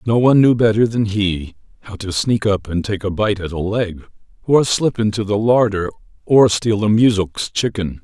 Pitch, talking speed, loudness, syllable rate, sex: 105 Hz, 200 wpm, -17 LUFS, 4.9 syllables/s, male